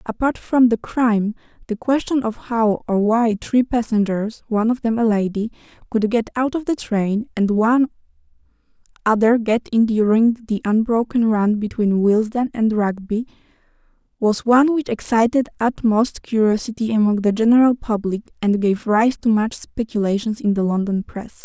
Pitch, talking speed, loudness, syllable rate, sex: 225 Hz, 160 wpm, -19 LUFS, 4.7 syllables/s, female